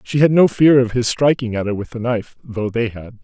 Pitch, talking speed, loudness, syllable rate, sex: 120 Hz, 280 wpm, -17 LUFS, 5.8 syllables/s, male